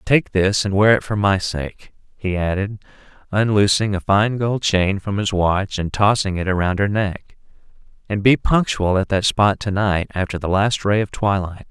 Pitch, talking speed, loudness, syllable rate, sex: 100 Hz, 195 wpm, -19 LUFS, 4.5 syllables/s, male